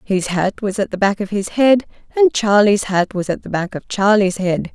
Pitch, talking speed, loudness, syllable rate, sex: 205 Hz, 240 wpm, -17 LUFS, 4.8 syllables/s, female